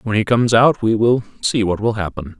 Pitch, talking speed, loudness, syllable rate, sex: 110 Hz, 250 wpm, -17 LUFS, 5.6 syllables/s, male